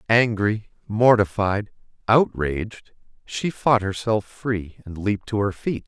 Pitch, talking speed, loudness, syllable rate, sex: 105 Hz, 125 wpm, -22 LUFS, 4.0 syllables/s, male